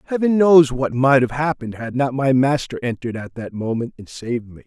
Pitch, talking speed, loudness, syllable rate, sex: 130 Hz, 220 wpm, -19 LUFS, 5.7 syllables/s, male